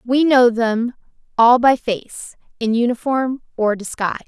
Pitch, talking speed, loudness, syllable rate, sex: 240 Hz, 140 wpm, -17 LUFS, 4.2 syllables/s, female